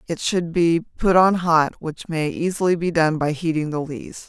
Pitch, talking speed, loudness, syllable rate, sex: 165 Hz, 210 wpm, -20 LUFS, 4.4 syllables/s, female